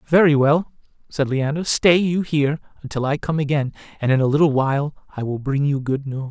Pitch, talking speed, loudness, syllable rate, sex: 145 Hz, 210 wpm, -20 LUFS, 5.5 syllables/s, male